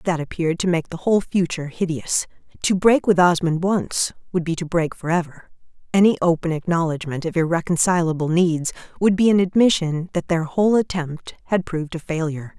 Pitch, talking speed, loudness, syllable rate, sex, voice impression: 170 Hz, 175 wpm, -20 LUFS, 5.7 syllables/s, female, feminine, middle-aged, slightly tensed, slightly hard, clear, fluent, raspy, intellectual, calm, elegant, lively, slightly strict, slightly sharp